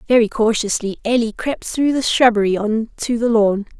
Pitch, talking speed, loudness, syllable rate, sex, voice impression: 225 Hz, 175 wpm, -17 LUFS, 5.0 syllables/s, female, very feminine, slightly young, slightly adult-like, thin, slightly tensed, slightly powerful, bright, slightly hard, clear, very fluent, slightly raspy, slightly cute, intellectual, refreshing, slightly sincere, slightly calm, slightly friendly, slightly reassuring, very unique, slightly wild, lively, strict, intense, slightly sharp